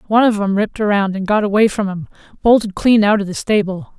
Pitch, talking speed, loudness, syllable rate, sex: 205 Hz, 225 wpm, -16 LUFS, 6.4 syllables/s, female